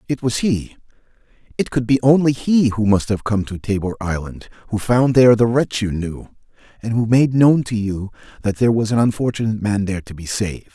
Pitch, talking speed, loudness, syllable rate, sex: 115 Hz, 210 wpm, -18 LUFS, 5.7 syllables/s, male